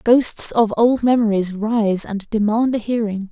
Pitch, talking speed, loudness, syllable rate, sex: 220 Hz, 165 wpm, -18 LUFS, 4.1 syllables/s, female